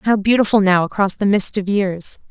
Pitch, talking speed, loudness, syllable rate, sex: 200 Hz, 210 wpm, -16 LUFS, 5.1 syllables/s, female